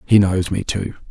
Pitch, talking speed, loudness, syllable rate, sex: 95 Hz, 215 wpm, -19 LUFS, 4.7 syllables/s, male